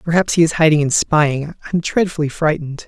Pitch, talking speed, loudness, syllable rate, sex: 155 Hz, 210 wpm, -16 LUFS, 6.2 syllables/s, male